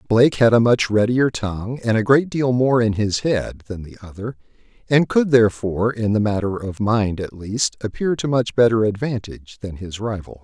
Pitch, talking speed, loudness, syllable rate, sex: 115 Hz, 200 wpm, -19 LUFS, 5.1 syllables/s, male